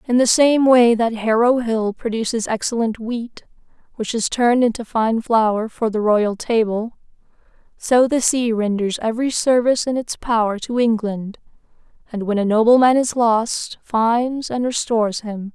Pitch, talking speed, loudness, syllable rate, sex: 230 Hz, 160 wpm, -18 LUFS, 4.5 syllables/s, female